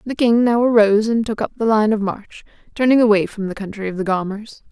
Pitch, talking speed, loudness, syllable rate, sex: 215 Hz, 240 wpm, -17 LUFS, 6.0 syllables/s, female